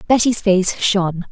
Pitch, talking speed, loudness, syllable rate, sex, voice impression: 195 Hz, 135 wpm, -16 LUFS, 4.6 syllables/s, female, feminine, slightly young, slightly tensed, slightly cute, friendly, slightly kind